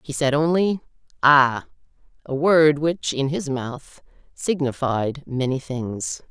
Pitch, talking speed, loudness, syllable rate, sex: 145 Hz, 115 wpm, -21 LUFS, 3.5 syllables/s, female